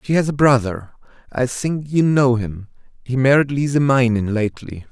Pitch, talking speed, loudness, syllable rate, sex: 130 Hz, 170 wpm, -18 LUFS, 4.7 syllables/s, male